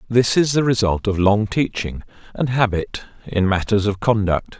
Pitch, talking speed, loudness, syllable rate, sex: 105 Hz, 170 wpm, -19 LUFS, 4.6 syllables/s, male